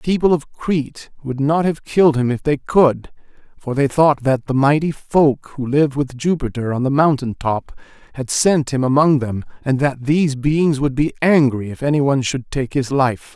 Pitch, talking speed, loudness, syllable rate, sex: 140 Hz, 205 wpm, -17 LUFS, 4.9 syllables/s, male